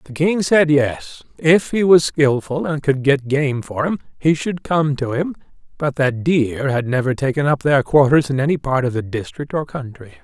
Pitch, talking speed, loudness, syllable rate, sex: 145 Hz, 210 wpm, -18 LUFS, 4.7 syllables/s, male